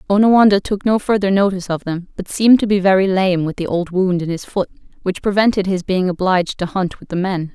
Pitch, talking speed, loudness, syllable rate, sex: 190 Hz, 240 wpm, -17 LUFS, 6.0 syllables/s, female